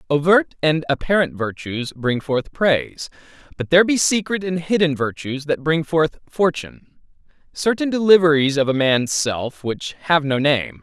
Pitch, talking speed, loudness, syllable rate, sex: 155 Hz, 155 wpm, -19 LUFS, 4.6 syllables/s, male